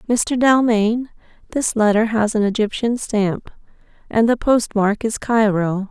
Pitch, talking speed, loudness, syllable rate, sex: 220 Hz, 130 wpm, -18 LUFS, 4.0 syllables/s, female